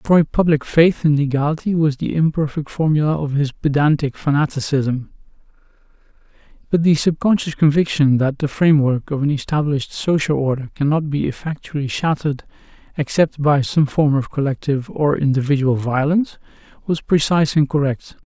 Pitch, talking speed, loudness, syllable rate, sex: 145 Hz, 140 wpm, -18 LUFS, 5.5 syllables/s, male